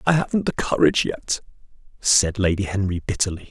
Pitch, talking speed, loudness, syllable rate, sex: 105 Hz, 135 wpm, -21 LUFS, 5.8 syllables/s, male